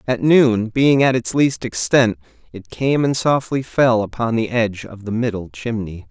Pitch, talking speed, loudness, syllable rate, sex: 115 Hz, 185 wpm, -18 LUFS, 4.5 syllables/s, male